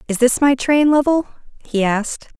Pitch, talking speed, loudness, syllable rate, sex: 255 Hz, 175 wpm, -16 LUFS, 5.3 syllables/s, female